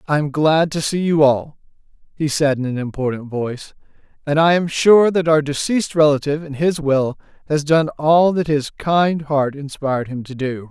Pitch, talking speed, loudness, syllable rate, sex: 150 Hz, 195 wpm, -18 LUFS, 5.0 syllables/s, male